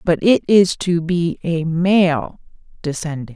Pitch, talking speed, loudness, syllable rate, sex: 170 Hz, 145 wpm, -17 LUFS, 3.7 syllables/s, female